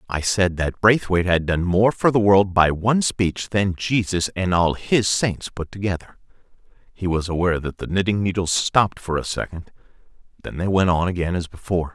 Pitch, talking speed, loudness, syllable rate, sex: 95 Hz, 195 wpm, -20 LUFS, 5.3 syllables/s, male